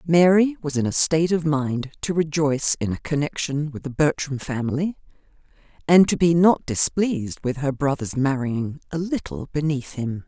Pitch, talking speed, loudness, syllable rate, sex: 150 Hz, 170 wpm, -22 LUFS, 4.9 syllables/s, female